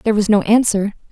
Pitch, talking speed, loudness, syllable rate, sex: 210 Hz, 215 wpm, -15 LUFS, 7.0 syllables/s, female